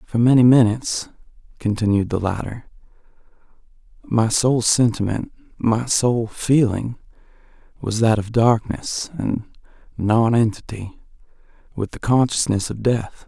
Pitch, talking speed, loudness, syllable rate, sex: 115 Hz, 95 wpm, -19 LUFS, 4.3 syllables/s, male